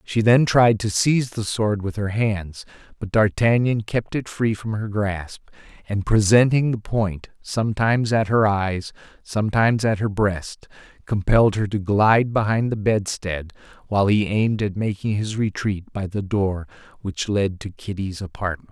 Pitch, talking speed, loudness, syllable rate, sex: 105 Hz, 165 wpm, -21 LUFS, 4.6 syllables/s, male